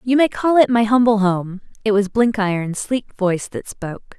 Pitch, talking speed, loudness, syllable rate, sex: 215 Hz, 185 wpm, -18 LUFS, 5.1 syllables/s, female